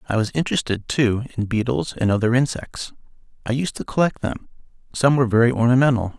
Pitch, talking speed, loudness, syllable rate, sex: 120 Hz, 175 wpm, -20 LUFS, 6.1 syllables/s, male